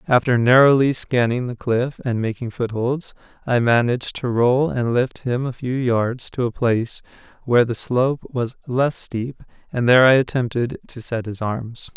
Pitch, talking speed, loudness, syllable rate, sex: 125 Hz, 175 wpm, -20 LUFS, 4.6 syllables/s, male